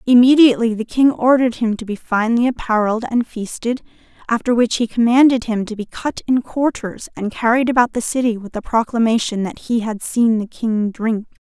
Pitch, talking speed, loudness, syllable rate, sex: 230 Hz, 190 wpm, -17 LUFS, 5.5 syllables/s, female